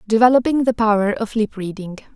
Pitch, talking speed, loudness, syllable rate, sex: 220 Hz, 165 wpm, -18 LUFS, 5.9 syllables/s, female